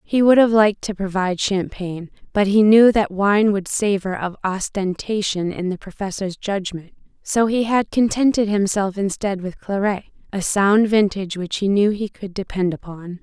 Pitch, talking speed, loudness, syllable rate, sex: 200 Hz, 170 wpm, -19 LUFS, 4.8 syllables/s, female